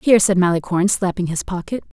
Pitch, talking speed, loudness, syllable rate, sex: 185 Hz, 180 wpm, -18 LUFS, 6.6 syllables/s, female